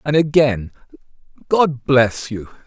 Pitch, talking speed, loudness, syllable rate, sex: 135 Hz, 110 wpm, -17 LUFS, 3.8 syllables/s, male